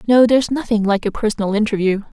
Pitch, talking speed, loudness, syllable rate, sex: 220 Hz, 190 wpm, -17 LUFS, 6.7 syllables/s, female